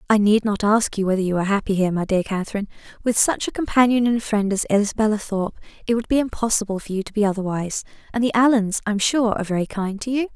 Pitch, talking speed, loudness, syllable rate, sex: 210 Hz, 245 wpm, -21 LUFS, 7.0 syllables/s, female